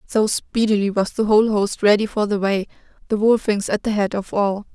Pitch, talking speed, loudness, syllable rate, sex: 210 Hz, 215 wpm, -19 LUFS, 5.4 syllables/s, female